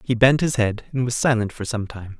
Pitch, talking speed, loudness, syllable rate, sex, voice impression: 115 Hz, 275 wpm, -21 LUFS, 5.5 syllables/s, male, masculine, adult-like, clear, slightly fluent, refreshing, sincere, friendly